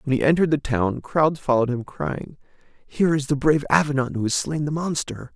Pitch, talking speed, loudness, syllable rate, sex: 140 Hz, 215 wpm, -22 LUFS, 5.9 syllables/s, male